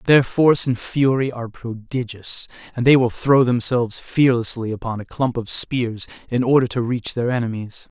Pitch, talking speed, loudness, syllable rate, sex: 120 Hz, 175 wpm, -20 LUFS, 4.9 syllables/s, male